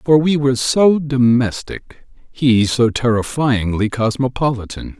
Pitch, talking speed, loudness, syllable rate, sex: 125 Hz, 110 wpm, -16 LUFS, 4.1 syllables/s, male